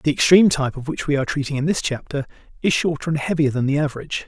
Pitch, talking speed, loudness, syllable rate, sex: 145 Hz, 255 wpm, -20 LUFS, 7.5 syllables/s, male